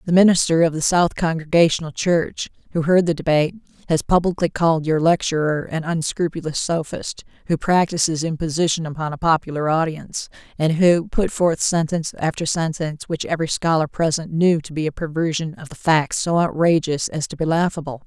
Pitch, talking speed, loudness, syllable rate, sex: 160 Hz, 170 wpm, -20 LUFS, 5.5 syllables/s, female